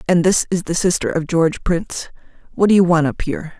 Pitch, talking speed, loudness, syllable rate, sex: 170 Hz, 215 wpm, -17 LUFS, 6.1 syllables/s, female